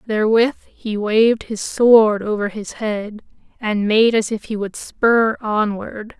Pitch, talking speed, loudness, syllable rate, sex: 215 Hz, 155 wpm, -18 LUFS, 3.7 syllables/s, female